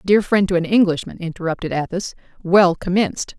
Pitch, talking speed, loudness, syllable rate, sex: 180 Hz, 160 wpm, -18 LUFS, 5.6 syllables/s, female